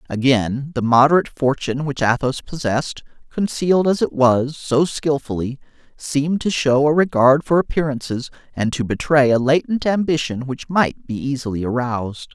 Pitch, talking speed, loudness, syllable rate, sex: 135 Hz, 150 wpm, -19 LUFS, 5.1 syllables/s, male